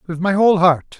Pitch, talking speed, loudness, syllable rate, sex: 180 Hz, 240 wpm, -15 LUFS, 5.9 syllables/s, male